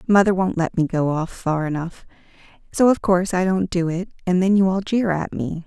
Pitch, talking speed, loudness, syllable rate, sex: 180 Hz, 235 wpm, -20 LUFS, 5.3 syllables/s, female